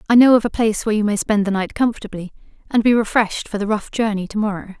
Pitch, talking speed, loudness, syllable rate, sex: 215 Hz, 265 wpm, -18 LUFS, 7.1 syllables/s, female